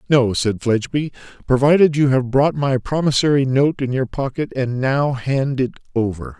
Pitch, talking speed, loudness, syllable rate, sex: 135 Hz, 170 wpm, -18 LUFS, 4.8 syllables/s, male